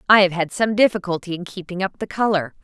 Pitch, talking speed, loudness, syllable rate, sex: 190 Hz, 230 wpm, -20 LUFS, 6.3 syllables/s, female